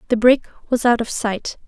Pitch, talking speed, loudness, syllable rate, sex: 235 Hz, 215 wpm, -19 LUFS, 5.1 syllables/s, female